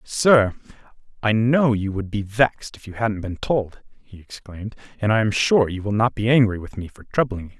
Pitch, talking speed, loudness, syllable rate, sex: 110 Hz, 230 wpm, -20 LUFS, 5.4 syllables/s, male